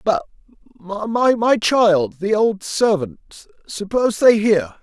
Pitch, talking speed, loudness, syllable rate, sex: 205 Hz, 85 wpm, -17 LUFS, 3.0 syllables/s, male